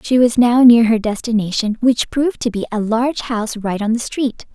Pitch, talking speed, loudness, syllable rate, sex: 230 Hz, 225 wpm, -16 LUFS, 5.4 syllables/s, female